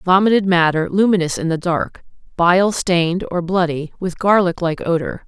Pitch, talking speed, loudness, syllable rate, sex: 175 Hz, 160 wpm, -17 LUFS, 4.8 syllables/s, female